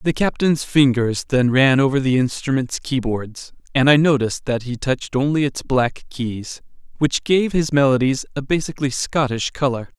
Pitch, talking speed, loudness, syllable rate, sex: 135 Hz, 160 wpm, -19 LUFS, 5.0 syllables/s, male